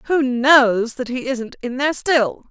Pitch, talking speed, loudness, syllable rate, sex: 260 Hz, 190 wpm, -18 LUFS, 3.8 syllables/s, female